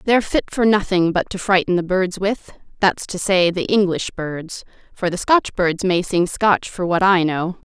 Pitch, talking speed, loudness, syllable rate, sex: 185 Hz, 205 wpm, -19 LUFS, 4.5 syllables/s, female